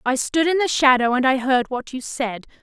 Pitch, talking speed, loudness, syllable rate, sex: 265 Hz, 250 wpm, -19 LUFS, 5.0 syllables/s, female